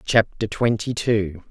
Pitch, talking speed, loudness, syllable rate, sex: 105 Hz, 120 wpm, -22 LUFS, 3.6 syllables/s, female